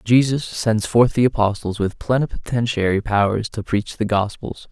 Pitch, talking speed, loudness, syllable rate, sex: 110 Hz, 155 wpm, -20 LUFS, 4.9 syllables/s, male